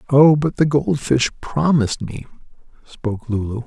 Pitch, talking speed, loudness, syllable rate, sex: 130 Hz, 145 wpm, -18 LUFS, 4.9 syllables/s, male